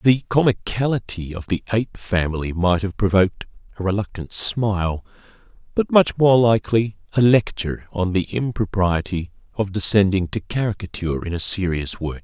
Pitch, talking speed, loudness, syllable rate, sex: 100 Hz, 140 wpm, -21 LUFS, 5.3 syllables/s, male